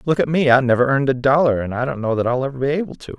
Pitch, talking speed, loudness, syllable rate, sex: 135 Hz, 340 wpm, -18 LUFS, 7.8 syllables/s, male